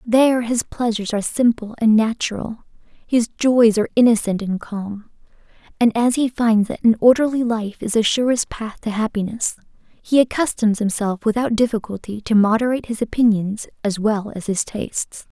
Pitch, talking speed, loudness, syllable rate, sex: 225 Hz, 160 wpm, -19 LUFS, 5.2 syllables/s, female